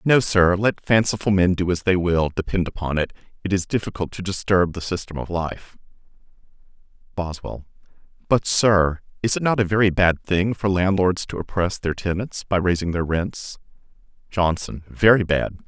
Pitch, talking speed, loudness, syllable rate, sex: 95 Hz, 170 wpm, -21 LUFS, 4.9 syllables/s, male